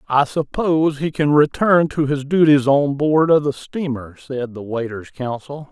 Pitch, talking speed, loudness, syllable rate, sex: 145 Hz, 180 wpm, -18 LUFS, 4.4 syllables/s, male